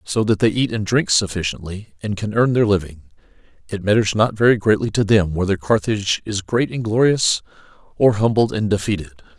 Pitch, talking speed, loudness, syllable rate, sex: 105 Hz, 185 wpm, -18 LUFS, 5.5 syllables/s, male